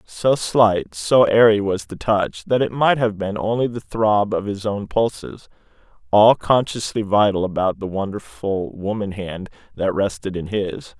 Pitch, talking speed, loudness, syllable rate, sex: 105 Hz, 170 wpm, -19 LUFS, 4.2 syllables/s, male